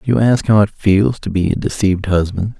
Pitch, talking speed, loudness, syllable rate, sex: 100 Hz, 230 wpm, -15 LUFS, 5.2 syllables/s, male